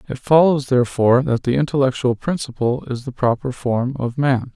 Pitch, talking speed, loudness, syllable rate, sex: 130 Hz, 170 wpm, -19 LUFS, 5.3 syllables/s, male